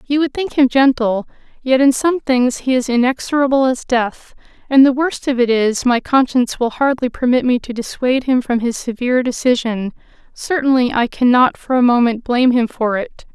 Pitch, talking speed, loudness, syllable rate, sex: 250 Hz, 195 wpm, -16 LUFS, 5.2 syllables/s, female